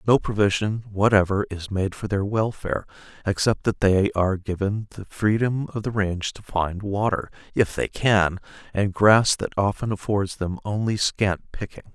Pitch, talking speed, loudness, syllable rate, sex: 100 Hz, 165 wpm, -23 LUFS, 4.6 syllables/s, male